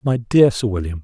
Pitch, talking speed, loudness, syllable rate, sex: 110 Hz, 235 wpm, -17 LUFS, 5.4 syllables/s, male